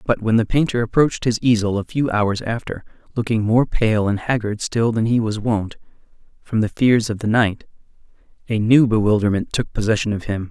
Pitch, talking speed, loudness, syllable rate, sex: 110 Hz, 195 wpm, -19 LUFS, 5.3 syllables/s, male